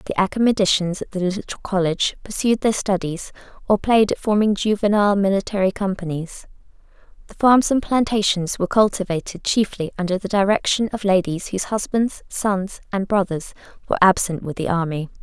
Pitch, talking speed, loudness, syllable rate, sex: 195 Hz, 150 wpm, -20 LUFS, 5.6 syllables/s, female